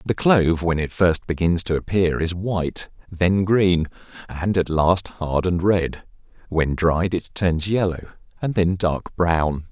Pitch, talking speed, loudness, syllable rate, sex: 90 Hz, 165 wpm, -21 LUFS, 3.9 syllables/s, male